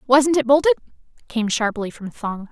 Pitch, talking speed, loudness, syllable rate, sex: 245 Hz, 165 wpm, -20 LUFS, 4.7 syllables/s, female